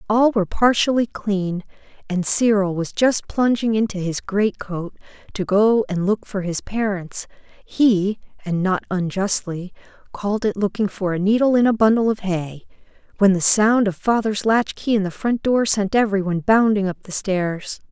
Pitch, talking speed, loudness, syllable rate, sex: 205 Hz, 170 wpm, -20 LUFS, 4.7 syllables/s, female